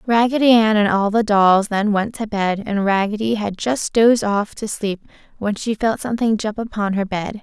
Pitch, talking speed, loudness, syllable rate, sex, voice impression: 215 Hz, 210 wpm, -18 LUFS, 4.9 syllables/s, female, very feminine, slightly young, slightly adult-like, very thin, very tensed, slightly powerful, very bright, slightly soft, very clear, fluent, slightly raspy, very cute, slightly intellectual, very refreshing, sincere, slightly calm, very friendly, very reassuring, very unique, slightly elegant, wild, sweet, lively, slightly kind, slightly sharp, light